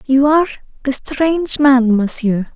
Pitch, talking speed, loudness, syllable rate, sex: 265 Hz, 140 wpm, -15 LUFS, 4.4 syllables/s, female